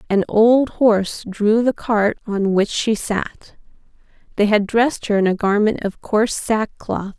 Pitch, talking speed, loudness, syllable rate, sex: 215 Hz, 165 wpm, -18 LUFS, 4.1 syllables/s, female